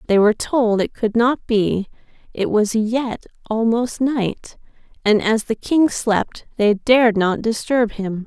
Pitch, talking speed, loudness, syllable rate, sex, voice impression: 225 Hz, 160 wpm, -18 LUFS, 3.8 syllables/s, female, feminine, slightly young, bright, clear, fluent, slightly raspy, friendly, reassuring, elegant, kind, modest